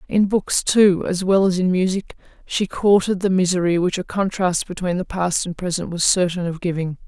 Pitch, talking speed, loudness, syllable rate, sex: 185 Hz, 205 wpm, -19 LUFS, 5.1 syllables/s, female